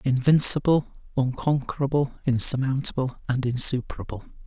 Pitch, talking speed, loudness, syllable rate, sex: 135 Hz, 65 wpm, -23 LUFS, 5.2 syllables/s, male